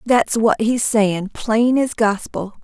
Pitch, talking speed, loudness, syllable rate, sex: 220 Hz, 160 wpm, -18 LUFS, 3.4 syllables/s, female